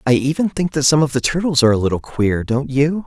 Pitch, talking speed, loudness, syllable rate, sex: 140 Hz, 275 wpm, -17 LUFS, 6.1 syllables/s, male